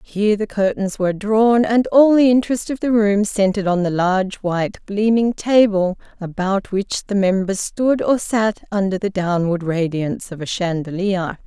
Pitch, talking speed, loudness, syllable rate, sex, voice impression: 200 Hz, 175 wpm, -18 LUFS, 4.7 syllables/s, female, feminine, very adult-like, slightly clear, slightly sincere, slightly calm, slightly friendly, reassuring